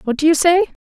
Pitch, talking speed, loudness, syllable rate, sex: 315 Hz, 275 wpm, -15 LUFS, 6.2 syllables/s, female